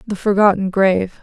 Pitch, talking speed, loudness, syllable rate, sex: 195 Hz, 145 wpm, -15 LUFS, 5.5 syllables/s, female